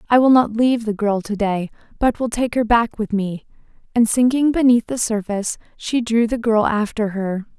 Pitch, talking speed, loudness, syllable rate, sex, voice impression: 225 Hz, 205 wpm, -19 LUFS, 4.7 syllables/s, female, feminine, slightly young, powerful, bright, soft, cute, calm, friendly, kind, slightly modest